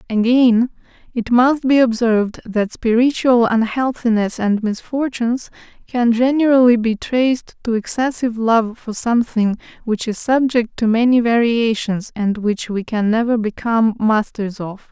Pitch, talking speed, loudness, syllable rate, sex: 230 Hz, 135 wpm, -17 LUFS, 4.5 syllables/s, female